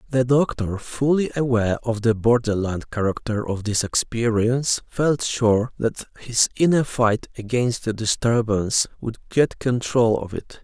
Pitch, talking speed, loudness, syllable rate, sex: 115 Hz, 140 wpm, -21 LUFS, 4.3 syllables/s, male